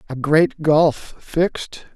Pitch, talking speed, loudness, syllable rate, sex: 155 Hz, 125 wpm, -18 LUFS, 2.9 syllables/s, male